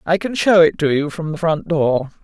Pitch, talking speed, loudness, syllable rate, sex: 160 Hz, 270 wpm, -17 LUFS, 5.0 syllables/s, male